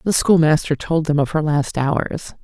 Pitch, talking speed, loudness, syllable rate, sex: 155 Hz, 200 wpm, -18 LUFS, 4.4 syllables/s, female